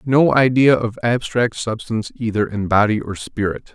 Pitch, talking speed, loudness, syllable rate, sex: 115 Hz, 160 wpm, -18 LUFS, 4.8 syllables/s, male